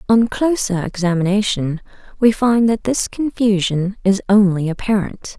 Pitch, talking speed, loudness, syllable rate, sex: 205 Hz, 125 wpm, -17 LUFS, 4.5 syllables/s, female